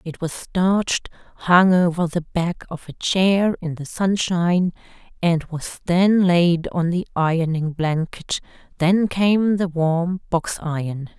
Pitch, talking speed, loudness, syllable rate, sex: 175 Hz, 145 wpm, -20 LUFS, 3.7 syllables/s, female